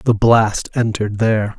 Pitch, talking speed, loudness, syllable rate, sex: 110 Hz, 150 wpm, -16 LUFS, 4.7 syllables/s, male